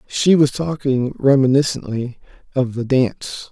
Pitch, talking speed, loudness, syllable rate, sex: 130 Hz, 120 wpm, -18 LUFS, 4.3 syllables/s, male